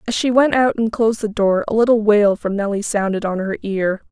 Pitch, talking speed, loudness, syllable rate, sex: 210 Hz, 250 wpm, -17 LUFS, 5.5 syllables/s, female